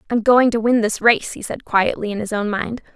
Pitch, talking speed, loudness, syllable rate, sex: 225 Hz, 265 wpm, -18 LUFS, 5.3 syllables/s, female